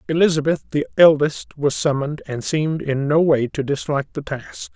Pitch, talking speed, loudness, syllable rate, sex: 150 Hz, 175 wpm, -19 LUFS, 5.4 syllables/s, male